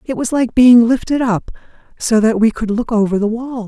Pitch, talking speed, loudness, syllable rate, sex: 235 Hz, 230 wpm, -14 LUFS, 5.1 syllables/s, female